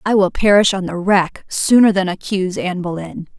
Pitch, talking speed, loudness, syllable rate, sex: 190 Hz, 195 wpm, -16 LUFS, 5.4 syllables/s, female